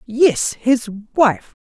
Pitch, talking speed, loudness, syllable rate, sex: 240 Hz, 110 wpm, -17 LUFS, 2.1 syllables/s, female